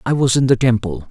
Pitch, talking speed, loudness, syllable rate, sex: 115 Hz, 270 wpm, -16 LUFS, 5.9 syllables/s, male